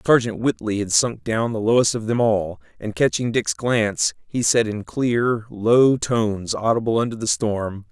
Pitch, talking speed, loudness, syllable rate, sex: 110 Hz, 180 wpm, -20 LUFS, 4.5 syllables/s, male